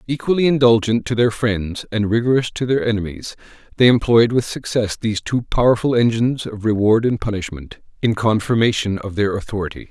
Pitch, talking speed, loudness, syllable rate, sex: 110 Hz, 165 wpm, -18 LUFS, 5.6 syllables/s, male